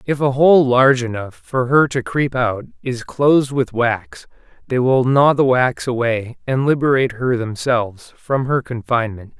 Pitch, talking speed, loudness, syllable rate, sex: 125 Hz, 170 wpm, -17 LUFS, 4.6 syllables/s, male